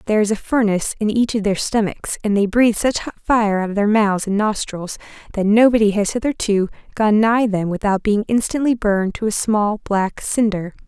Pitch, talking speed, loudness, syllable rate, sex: 210 Hz, 205 wpm, -18 LUFS, 5.4 syllables/s, female